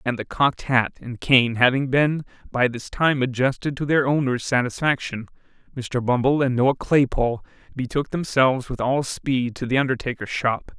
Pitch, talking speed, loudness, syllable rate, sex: 130 Hz, 165 wpm, -22 LUFS, 5.0 syllables/s, male